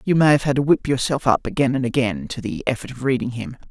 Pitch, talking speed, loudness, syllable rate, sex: 130 Hz, 275 wpm, -20 LUFS, 6.3 syllables/s, male